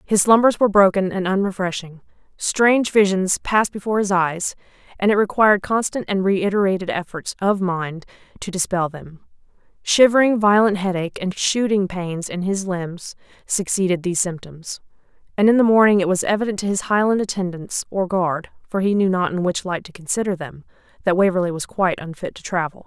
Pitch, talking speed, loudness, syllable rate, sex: 190 Hz, 175 wpm, -19 LUFS, 5.5 syllables/s, female